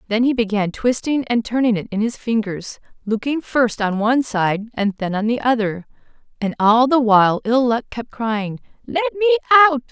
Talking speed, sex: 205 wpm, female